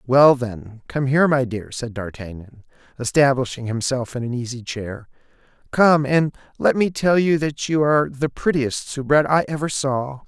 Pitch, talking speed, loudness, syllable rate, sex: 135 Hz, 170 wpm, -20 LUFS, 4.7 syllables/s, male